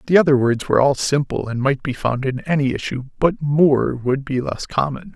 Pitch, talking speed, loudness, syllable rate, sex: 140 Hz, 220 wpm, -19 LUFS, 5.1 syllables/s, male